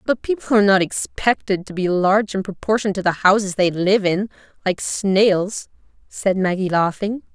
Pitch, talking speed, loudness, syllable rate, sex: 195 Hz, 170 wpm, -19 LUFS, 4.8 syllables/s, female